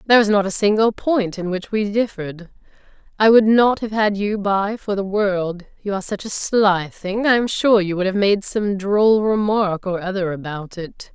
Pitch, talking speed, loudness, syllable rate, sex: 200 Hz, 215 wpm, -19 LUFS, 4.7 syllables/s, female